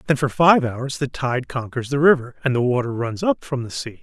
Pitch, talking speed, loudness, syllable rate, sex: 130 Hz, 255 wpm, -20 LUFS, 5.3 syllables/s, male